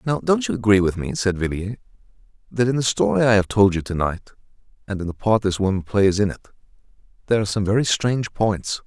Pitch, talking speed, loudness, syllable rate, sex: 105 Hz, 225 wpm, -20 LUFS, 6.4 syllables/s, male